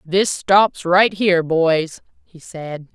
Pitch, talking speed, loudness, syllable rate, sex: 175 Hz, 145 wpm, -16 LUFS, 3.1 syllables/s, female